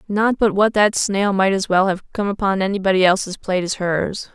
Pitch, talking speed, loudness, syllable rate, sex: 195 Hz, 220 wpm, -18 LUFS, 5.4 syllables/s, female